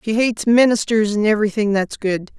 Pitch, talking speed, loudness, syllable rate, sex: 215 Hz, 175 wpm, -17 LUFS, 5.8 syllables/s, female